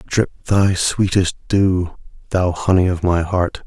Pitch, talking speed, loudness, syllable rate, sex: 90 Hz, 145 wpm, -18 LUFS, 3.5 syllables/s, male